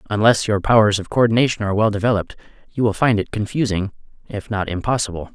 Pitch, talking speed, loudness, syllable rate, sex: 105 Hz, 180 wpm, -19 LUFS, 6.5 syllables/s, male